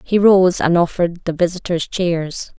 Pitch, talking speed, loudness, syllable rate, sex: 175 Hz, 160 wpm, -17 LUFS, 4.5 syllables/s, female